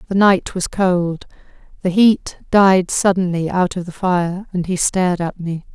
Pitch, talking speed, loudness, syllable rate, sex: 180 Hz, 175 wpm, -17 LUFS, 4.2 syllables/s, female